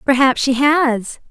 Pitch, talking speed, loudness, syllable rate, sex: 265 Hz, 140 wpm, -15 LUFS, 3.5 syllables/s, female